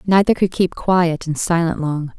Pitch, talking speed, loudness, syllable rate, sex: 170 Hz, 190 wpm, -18 LUFS, 4.4 syllables/s, female